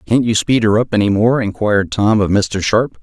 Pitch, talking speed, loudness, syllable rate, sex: 105 Hz, 240 wpm, -15 LUFS, 5.2 syllables/s, male